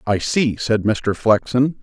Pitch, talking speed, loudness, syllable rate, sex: 115 Hz, 165 wpm, -18 LUFS, 3.6 syllables/s, male